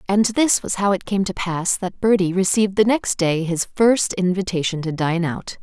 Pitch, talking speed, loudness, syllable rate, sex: 190 Hz, 215 wpm, -19 LUFS, 4.9 syllables/s, female